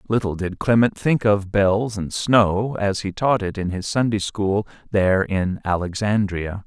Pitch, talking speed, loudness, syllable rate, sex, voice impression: 100 Hz, 170 wpm, -21 LUFS, 4.2 syllables/s, male, masculine, middle-aged, slightly thick, slightly powerful, soft, clear, fluent, cool, intellectual, calm, friendly, reassuring, slightly wild, lively, slightly light